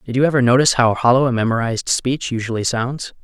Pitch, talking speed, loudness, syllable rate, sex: 125 Hz, 205 wpm, -17 LUFS, 6.6 syllables/s, male